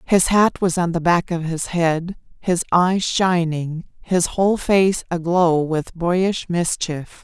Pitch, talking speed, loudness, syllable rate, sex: 175 Hz, 160 wpm, -19 LUFS, 3.4 syllables/s, female